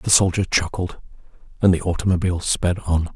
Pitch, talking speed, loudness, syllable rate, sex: 90 Hz, 150 wpm, -20 LUFS, 5.6 syllables/s, male